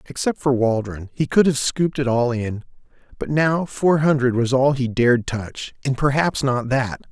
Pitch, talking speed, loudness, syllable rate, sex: 130 Hz, 185 wpm, -20 LUFS, 4.7 syllables/s, male